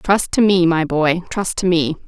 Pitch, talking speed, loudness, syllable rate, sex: 175 Hz, 230 wpm, -17 LUFS, 4.3 syllables/s, female